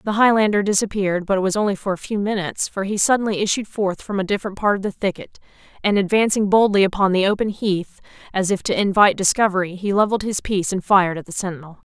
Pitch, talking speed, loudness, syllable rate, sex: 195 Hz, 220 wpm, -19 LUFS, 6.8 syllables/s, female